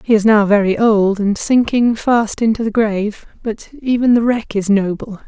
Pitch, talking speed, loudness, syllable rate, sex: 215 Hz, 195 wpm, -15 LUFS, 4.7 syllables/s, female